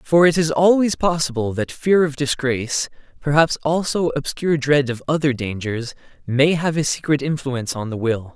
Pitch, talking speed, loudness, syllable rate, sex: 145 Hz, 170 wpm, -19 LUFS, 5.1 syllables/s, male